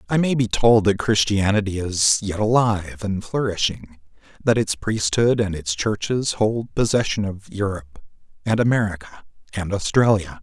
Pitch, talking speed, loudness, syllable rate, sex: 105 Hz, 145 wpm, -21 LUFS, 4.6 syllables/s, male